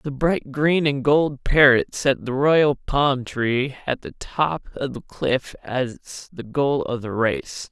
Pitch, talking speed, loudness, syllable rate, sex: 135 Hz, 180 wpm, -21 LUFS, 3.3 syllables/s, male